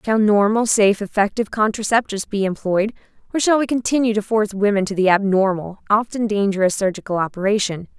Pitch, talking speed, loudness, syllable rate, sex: 205 Hz, 160 wpm, -19 LUFS, 6.2 syllables/s, female